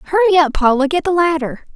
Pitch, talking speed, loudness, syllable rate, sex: 315 Hz, 205 wpm, -15 LUFS, 6.3 syllables/s, female